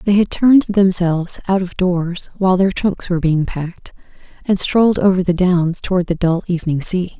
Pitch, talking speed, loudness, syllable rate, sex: 180 Hz, 190 wpm, -16 LUFS, 5.3 syllables/s, female